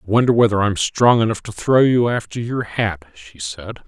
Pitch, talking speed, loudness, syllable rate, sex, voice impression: 110 Hz, 215 wpm, -18 LUFS, 5.0 syllables/s, male, very masculine, very adult-like, old, very thick, slightly tensed, slightly powerful, slightly dark, slightly soft, slightly muffled, fluent, slightly raspy, cool, very intellectual, very sincere, very calm, very mature, friendly, very reassuring, very unique, elegant, wild, sweet, lively, kind, slightly modest